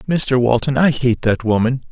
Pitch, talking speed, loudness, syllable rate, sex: 130 Hz, 190 wpm, -16 LUFS, 4.7 syllables/s, male